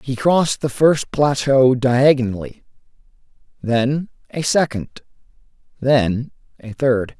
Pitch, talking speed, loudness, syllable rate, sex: 130 Hz, 100 wpm, -18 LUFS, 3.7 syllables/s, male